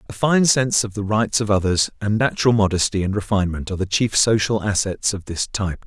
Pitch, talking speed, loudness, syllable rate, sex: 105 Hz, 215 wpm, -19 LUFS, 6.1 syllables/s, male